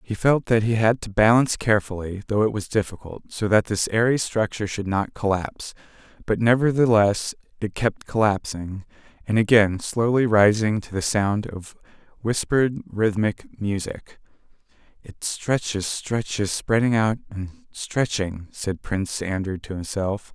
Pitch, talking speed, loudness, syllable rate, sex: 105 Hz, 140 wpm, -22 LUFS, 4.5 syllables/s, male